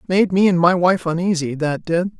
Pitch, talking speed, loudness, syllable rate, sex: 175 Hz, 220 wpm, -17 LUFS, 5.1 syllables/s, female